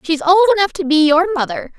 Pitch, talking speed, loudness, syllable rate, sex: 340 Hz, 235 wpm, -14 LUFS, 6.5 syllables/s, female